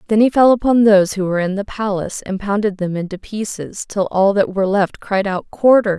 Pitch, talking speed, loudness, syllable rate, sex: 200 Hz, 230 wpm, -17 LUFS, 5.7 syllables/s, female